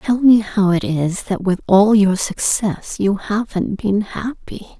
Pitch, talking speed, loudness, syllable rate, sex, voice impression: 200 Hz, 175 wpm, -17 LUFS, 3.8 syllables/s, female, feminine, middle-aged, tensed, powerful, slightly hard, halting, intellectual, calm, friendly, reassuring, elegant, lively, slightly strict